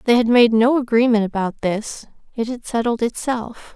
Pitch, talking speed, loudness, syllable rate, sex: 230 Hz, 175 wpm, -18 LUFS, 4.9 syllables/s, female